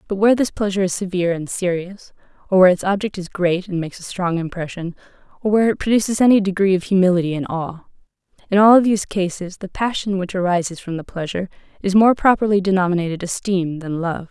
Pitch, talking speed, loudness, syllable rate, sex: 185 Hz, 195 wpm, -19 LUFS, 6.5 syllables/s, female